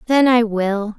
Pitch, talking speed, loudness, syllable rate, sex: 225 Hz, 185 wpm, -16 LUFS, 3.7 syllables/s, female